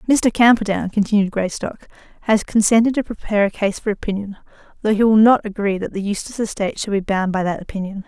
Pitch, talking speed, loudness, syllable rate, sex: 205 Hz, 200 wpm, -18 LUFS, 6.4 syllables/s, female